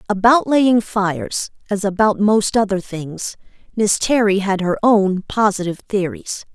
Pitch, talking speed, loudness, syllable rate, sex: 205 Hz, 140 wpm, -17 LUFS, 4.3 syllables/s, female